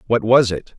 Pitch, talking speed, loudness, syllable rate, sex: 115 Hz, 230 wpm, -16 LUFS, 4.8 syllables/s, male